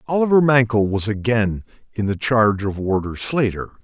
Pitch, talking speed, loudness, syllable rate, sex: 115 Hz, 155 wpm, -19 LUFS, 5.2 syllables/s, male